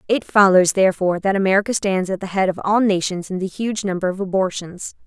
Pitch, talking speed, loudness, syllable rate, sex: 190 Hz, 215 wpm, -19 LUFS, 6.1 syllables/s, female